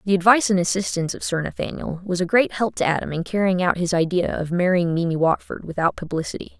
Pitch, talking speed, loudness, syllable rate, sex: 180 Hz, 220 wpm, -21 LUFS, 6.4 syllables/s, female